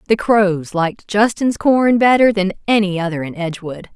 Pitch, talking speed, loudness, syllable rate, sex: 200 Hz, 165 wpm, -16 LUFS, 5.1 syllables/s, female